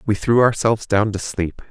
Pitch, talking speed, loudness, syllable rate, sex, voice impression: 105 Hz, 210 wpm, -18 LUFS, 5.2 syllables/s, male, masculine, adult-like, tensed, fluent, cool, intellectual, calm, friendly, wild, kind, modest